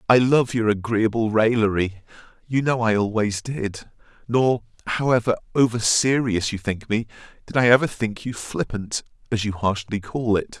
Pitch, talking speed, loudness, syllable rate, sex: 110 Hz, 160 wpm, -22 LUFS, 4.7 syllables/s, male